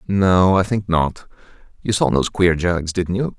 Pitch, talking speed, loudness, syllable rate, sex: 90 Hz, 195 wpm, -18 LUFS, 4.4 syllables/s, male